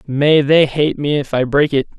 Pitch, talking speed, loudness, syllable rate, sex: 145 Hz, 240 wpm, -15 LUFS, 4.6 syllables/s, male